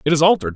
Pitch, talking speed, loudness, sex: 155 Hz, 325 wpm, -16 LUFS, male